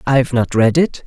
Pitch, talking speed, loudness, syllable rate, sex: 130 Hz, 225 wpm, -15 LUFS, 5.3 syllables/s, male